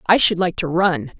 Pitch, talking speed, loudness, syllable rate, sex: 180 Hz, 250 wpm, -18 LUFS, 4.8 syllables/s, female